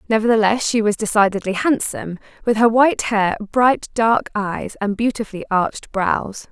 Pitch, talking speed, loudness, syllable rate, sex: 215 Hz, 145 wpm, -18 LUFS, 5.1 syllables/s, female